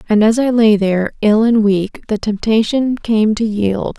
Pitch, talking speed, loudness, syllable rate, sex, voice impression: 215 Hz, 195 wpm, -14 LUFS, 4.4 syllables/s, female, feminine, adult-like, tensed, bright, soft, fluent, slightly raspy, calm, kind, modest